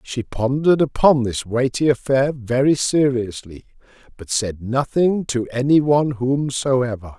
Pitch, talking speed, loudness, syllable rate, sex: 130 Hz, 125 wpm, -19 LUFS, 4.1 syllables/s, male